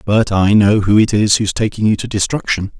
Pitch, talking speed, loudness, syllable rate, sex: 105 Hz, 235 wpm, -14 LUFS, 5.4 syllables/s, male